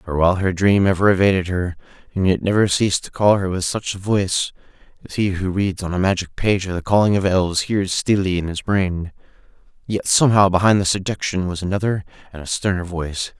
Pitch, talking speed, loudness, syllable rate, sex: 95 Hz, 210 wpm, -19 LUFS, 5.9 syllables/s, male